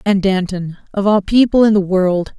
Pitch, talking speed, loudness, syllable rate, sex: 195 Hz, 200 wpm, -15 LUFS, 4.7 syllables/s, female